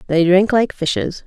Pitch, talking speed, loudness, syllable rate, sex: 180 Hz, 190 wpm, -16 LUFS, 4.7 syllables/s, female